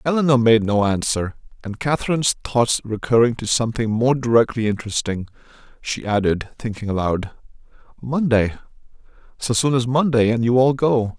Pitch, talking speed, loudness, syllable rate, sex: 120 Hz, 135 wpm, -19 LUFS, 5.3 syllables/s, male